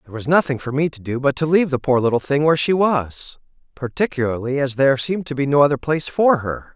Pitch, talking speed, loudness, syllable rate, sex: 140 Hz, 250 wpm, -19 LUFS, 6.6 syllables/s, male